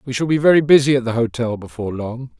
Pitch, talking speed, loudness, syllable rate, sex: 125 Hz, 250 wpm, -17 LUFS, 6.7 syllables/s, male